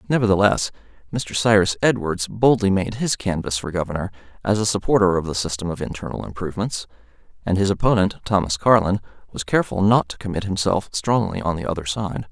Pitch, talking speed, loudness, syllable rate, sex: 95 Hz, 170 wpm, -21 LUFS, 6.0 syllables/s, male